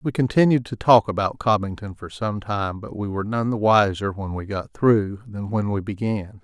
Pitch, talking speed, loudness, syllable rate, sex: 105 Hz, 215 wpm, -22 LUFS, 4.9 syllables/s, male